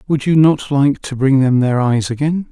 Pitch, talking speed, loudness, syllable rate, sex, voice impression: 140 Hz, 240 wpm, -15 LUFS, 4.7 syllables/s, male, very masculine, old, very thick, relaxed, powerful, dark, soft, clear, fluent, raspy, very cool, intellectual, slightly refreshing, sincere, calm, mature, slightly friendly, reassuring, unique, slightly elegant, wild, sweet, slightly lively, kind, modest